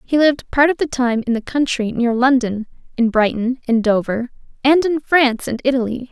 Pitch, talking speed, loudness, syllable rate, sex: 250 Hz, 195 wpm, -17 LUFS, 5.3 syllables/s, female